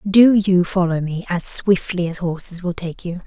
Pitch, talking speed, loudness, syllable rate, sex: 180 Hz, 200 wpm, -18 LUFS, 4.5 syllables/s, female